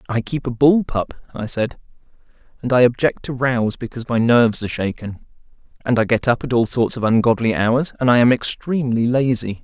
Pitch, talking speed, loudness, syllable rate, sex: 120 Hz, 200 wpm, -18 LUFS, 5.6 syllables/s, male